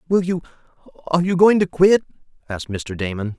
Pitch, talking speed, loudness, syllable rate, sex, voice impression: 155 Hz, 160 wpm, -19 LUFS, 6.3 syllables/s, male, masculine, adult-like, tensed, powerful, clear, fluent, slightly raspy, intellectual, wild, lively, slightly strict, slightly sharp